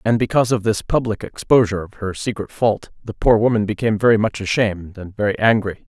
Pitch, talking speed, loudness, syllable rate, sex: 105 Hz, 200 wpm, -19 LUFS, 6.2 syllables/s, male